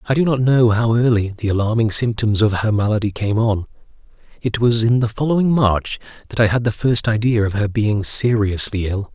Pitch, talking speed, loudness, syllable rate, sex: 110 Hz, 205 wpm, -17 LUFS, 5.3 syllables/s, male